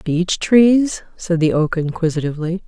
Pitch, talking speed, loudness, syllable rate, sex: 175 Hz, 135 wpm, -17 LUFS, 4.5 syllables/s, female